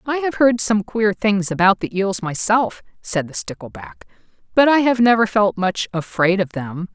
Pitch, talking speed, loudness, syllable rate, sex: 200 Hz, 190 wpm, -18 LUFS, 4.6 syllables/s, female